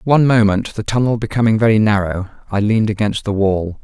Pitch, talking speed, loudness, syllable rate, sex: 105 Hz, 205 wpm, -16 LUFS, 6.2 syllables/s, male